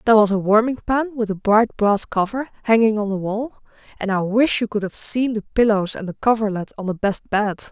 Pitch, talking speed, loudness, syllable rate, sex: 215 Hz, 235 wpm, -20 LUFS, 5.3 syllables/s, female